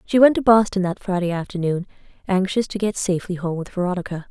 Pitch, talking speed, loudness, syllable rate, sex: 190 Hz, 195 wpm, -21 LUFS, 6.3 syllables/s, female